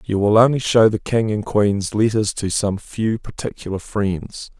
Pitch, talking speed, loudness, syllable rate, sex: 105 Hz, 185 wpm, -19 LUFS, 4.3 syllables/s, male